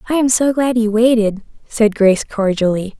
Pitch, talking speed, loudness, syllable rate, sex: 220 Hz, 180 wpm, -15 LUFS, 5.2 syllables/s, female